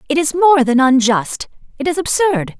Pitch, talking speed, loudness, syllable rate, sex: 285 Hz, 160 wpm, -14 LUFS, 4.8 syllables/s, female